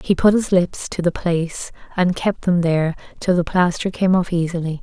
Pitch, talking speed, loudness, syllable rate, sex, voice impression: 175 Hz, 210 wpm, -19 LUFS, 5.2 syllables/s, female, feminine, adult-like, slightly fluent, slightly calm, slightly unique, slightly kind